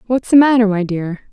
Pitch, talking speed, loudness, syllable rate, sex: 215 Hz, 225 wpm, -14 LUFS, 5.2 syllables/s, female